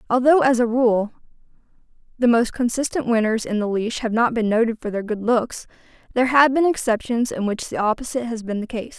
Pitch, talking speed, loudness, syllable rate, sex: 235 Hz, 205 wpm, -20 LUFS, 5.8 syllables/s, female